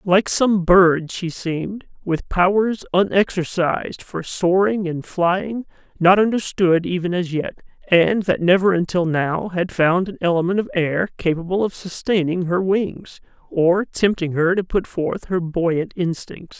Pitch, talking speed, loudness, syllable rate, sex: 180 Hz, 150 wpm, -19 LUFS, 4.1 syllables/s, male